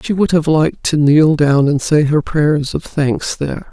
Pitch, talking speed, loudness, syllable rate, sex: 150 Hz, 225 wpm, -14 LUFS, 4.5 syllables/s, female